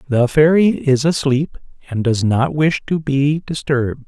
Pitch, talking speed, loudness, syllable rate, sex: 140 Hz, 160 wpm, -16 LUFS, 4.3 syllables/s, male